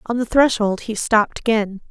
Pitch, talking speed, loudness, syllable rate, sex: 220 Hz, 190 wpm, -18 LUFS, 5.2 syllables/s, female